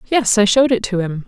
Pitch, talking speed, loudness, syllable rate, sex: 215 Hz, 280 wpm, -15 LUFS, 6.0 syllables/s, female